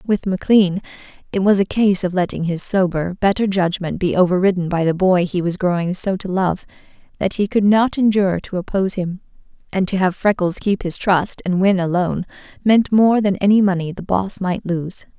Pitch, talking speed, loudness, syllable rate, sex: 190 Hz, 200 wpm, -18 LUFS, 5.3 syllables/s, female